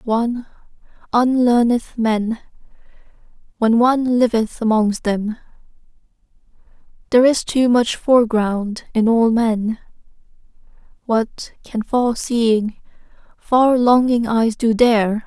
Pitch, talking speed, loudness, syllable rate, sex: 230 Hz, 95 wpm, -17 LUFS, 3.8 syllables/s, female